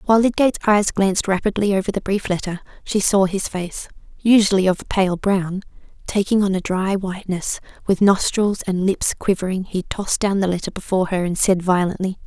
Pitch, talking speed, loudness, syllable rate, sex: 195 Hz, 185 wpm, -19 LUFS, 5.6 syllables/s, female